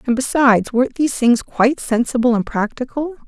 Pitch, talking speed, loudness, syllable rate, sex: 250 Hz, 165 wpm, -17 LUFS, 5.9 syllables/s, female